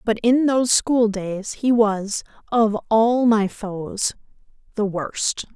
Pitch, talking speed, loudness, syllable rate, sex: 220 Hz, 140 wpm, -20 LUFS, 3.2 syllables/s, female